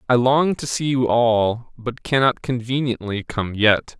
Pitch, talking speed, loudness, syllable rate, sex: 120 Hz, 165 wpm, -20 LUFS, 4.0 syllables/s, male